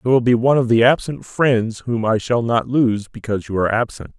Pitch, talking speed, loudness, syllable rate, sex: 120 Hz, 245 wpm, -18 LUFS, 5.8 syllables/s, male